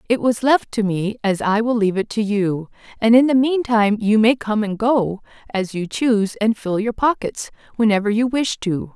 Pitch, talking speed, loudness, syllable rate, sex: 220 Hz, 215 wpm, -19 LUFS, 4.9 syllables/s, female